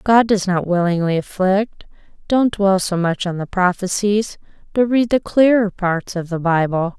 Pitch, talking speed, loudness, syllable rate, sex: 195 Hz, 170 wpm, -18 LUFS, 4.4 syllables/s, female